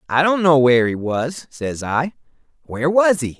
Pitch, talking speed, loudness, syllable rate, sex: 145 Hz, 195 wpm, -18 LUFS, 4.9 syllables/s, male